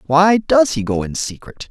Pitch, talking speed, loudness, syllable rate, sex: 160 Hz, 210 wpm, -16 LUFS, 4.5 syllables/s, male